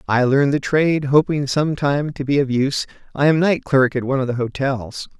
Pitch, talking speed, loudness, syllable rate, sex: 140 Hz, 230 wpm, -18 LUFS, 5.6 syllables/s, male